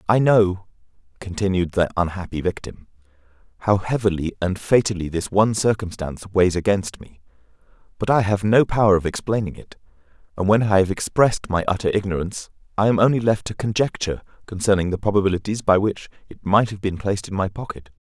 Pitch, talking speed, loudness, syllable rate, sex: 100 Hz, 170 wpm, -21 LUFS, 6.0 syllables/s, male